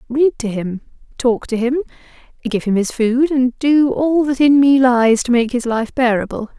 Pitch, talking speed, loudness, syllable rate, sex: 250 Hz, 180 wpm, -16 LUFS, 4.7 syllables/s, female